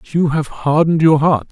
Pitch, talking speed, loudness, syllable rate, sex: 155 Hz, 200 wpm, -14 LUFS, 5.0 syllables/s, male